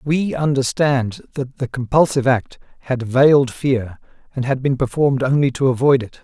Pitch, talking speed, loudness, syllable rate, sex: 130 Hz, 165 wpm, -18 LUFS, 4.9 syllables/s, male